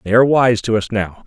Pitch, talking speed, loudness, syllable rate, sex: 110 Hz, 285 wpm, -15 LUFS, 6.2 syllables/s, male